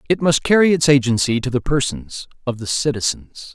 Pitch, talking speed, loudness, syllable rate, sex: 135 Hz, 185 wpm, -18 LUFS, 5.4 syllables/s, male